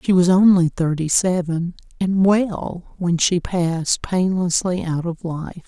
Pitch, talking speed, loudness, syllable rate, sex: 175 Hz, 150 wpm, -19 LUFS, 3.8 syllables/s, female